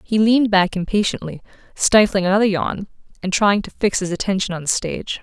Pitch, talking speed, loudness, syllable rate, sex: 195 Hz, 185 wpm, -18 LUFS, 5.8 syllables/s, female